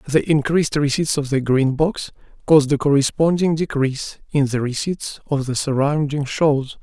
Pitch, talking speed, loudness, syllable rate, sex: 145 Hz, 160 wpm, -19 LUFS, 4.9 syllables/s, male